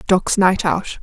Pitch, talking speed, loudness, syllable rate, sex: 185 Hz, 175 wpm, -17 LUFS, 3.6 syllables/s, female